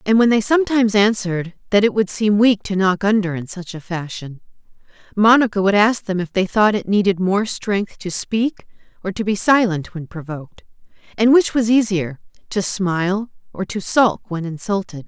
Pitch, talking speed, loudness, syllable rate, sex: 200 Hz, 185 wpm, -18 LUFS, 5.1 syllables/s, female